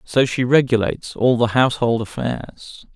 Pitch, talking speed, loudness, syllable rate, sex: 120 Hz, 140 wpm, -19 LUFS, 4.6 syllables/s, male